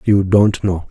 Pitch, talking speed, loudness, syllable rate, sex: 95 Hz, 200 wpm, -15 LUFS, 3.8 syllables/s, male